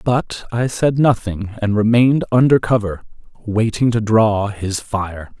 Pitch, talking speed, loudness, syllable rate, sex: 110 Hz, 145 wpm, -17 LUFS, 4.0 syllables/s, male